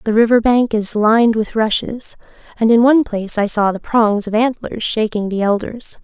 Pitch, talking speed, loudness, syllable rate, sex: 220 Hz, 200 wpm, -15 LUFS, 5.1 syllables/s, female